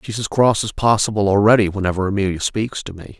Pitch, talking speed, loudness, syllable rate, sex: 105 Hz, 205 wpm, -17 LUFS, 6.2 syllables/s, male